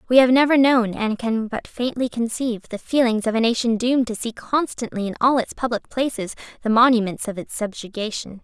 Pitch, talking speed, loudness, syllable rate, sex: 235 Hz, 200 wpm, -21 LUFS, 5.6 syllables/s, female